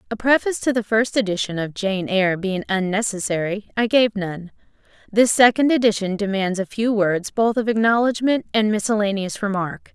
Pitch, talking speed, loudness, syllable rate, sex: 210 Hz, 165 wpm, -20 LUFS, 5.3 syllables/s, female